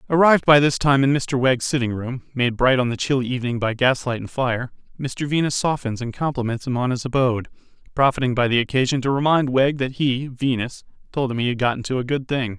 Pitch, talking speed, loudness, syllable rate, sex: 130 Hz, 225 wpm, -21 LUFS, 6.0 syllables/s, male